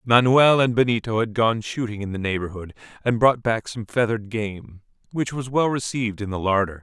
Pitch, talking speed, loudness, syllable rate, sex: 115 Hz, 195 wpm, -22 LUFS, 5.4 syllables/s, male